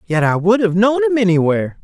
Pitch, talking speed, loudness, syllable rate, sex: 170 Hz, 230 wpm, -15 LUFS, 5.8 syllables/s, male